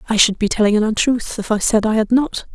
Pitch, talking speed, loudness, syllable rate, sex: 220 Hz, 285 wpm, -17 LUFS, 6.1 syllables/s, female